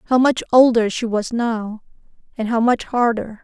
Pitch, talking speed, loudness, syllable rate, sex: 230 Hz, 175 wpm, -18 LUFS, 4.6 syllables/s, female